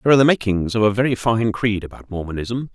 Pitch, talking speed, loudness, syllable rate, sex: 110 Hz, 240 wpm, -19 LUFS, 6.8 syllables/s, male